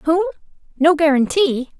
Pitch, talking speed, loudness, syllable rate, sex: 320 Hz, 100 wpm, -17 LUFS, 4.5 syllables/s, female